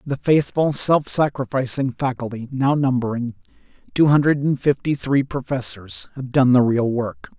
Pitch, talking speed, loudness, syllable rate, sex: 130 Hz, 145 wpm, -20 LUFS, 4.6 syllables/s, male